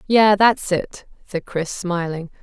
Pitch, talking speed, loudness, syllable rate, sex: 185 Hz, 150 wpm, -19 LUFS, 3.6 syllables/s, female